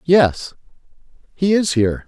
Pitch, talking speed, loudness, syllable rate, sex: 150 Hz, 115 wpm, -17 LUFS, 4.3 syllables/s, male